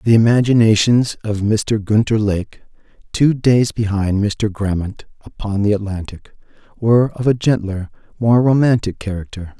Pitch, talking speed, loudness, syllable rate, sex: 110 Hz, 130 wpm, -16 LUFS, 4.6 syllables/s, male